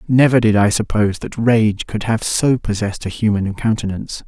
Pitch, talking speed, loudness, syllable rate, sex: 110 Hz, 185 wpm, -17 LUFS, 5.4 syllables/s, male